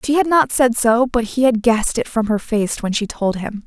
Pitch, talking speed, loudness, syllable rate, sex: 235 Hz, 280 wpm, -17 LUFS, 5.1 syllables/s, female